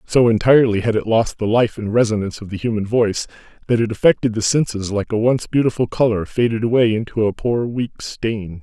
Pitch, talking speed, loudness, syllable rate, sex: 110 Hz, 210 wpm, -18 LUFS, 5.8 syllables/s, male